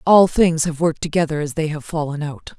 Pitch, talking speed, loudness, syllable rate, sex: 160 Hz, 230 wpm, -19 LUFS, 5.7 syllables/s, female